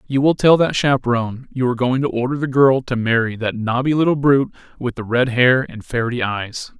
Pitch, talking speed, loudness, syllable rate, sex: 125 Hz, 220 wpm, -18 LUFS, 5.7 syllables/s, male